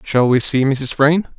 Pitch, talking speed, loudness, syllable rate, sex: 140 Hz, 215 wpm, -15 LUFS, 4.1 syllables/s, male